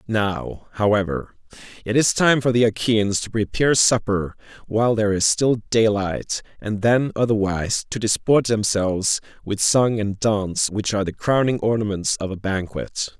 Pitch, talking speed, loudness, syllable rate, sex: 105 Hz, 155 wpm, -20 LUFS, 4.8 syllables/s, male